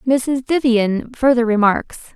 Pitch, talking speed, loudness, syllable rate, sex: 245 Hz, 110 wpm, -17 LUFS, 3.7 syllables/s, female